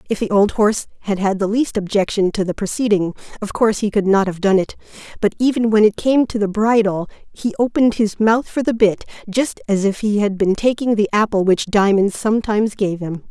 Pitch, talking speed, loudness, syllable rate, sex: 210 Hz, 220 wpm, -17 LUFS, 5.6 syllables/s, female